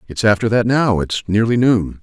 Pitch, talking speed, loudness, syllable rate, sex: 110 Hz, 180 wpm, -16 LUFS, 4.8 syllables/s, male